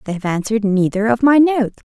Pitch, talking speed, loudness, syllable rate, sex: 225 Hz, 215 wpm, -16 LUFS, 6.4 syllables/s, female